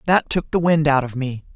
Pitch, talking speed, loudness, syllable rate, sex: 150 Hz, 270 wpm, -19 LUFS, 5.3 syllables/s, male